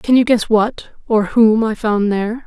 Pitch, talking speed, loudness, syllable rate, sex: 220 Hz, 220 wpm, -15 LUFS, 4.4 syllables/s, female